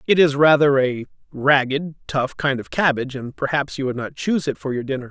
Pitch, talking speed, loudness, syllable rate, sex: 140 Hz, 235 wpm, -20 LUFS, 6.1 syllables/s, male